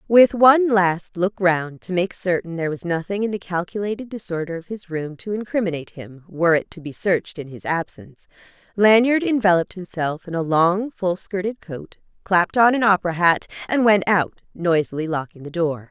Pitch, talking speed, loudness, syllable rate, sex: 185 Hz, 190 wpm, -20 LUFS, 5.5 syllables/s, female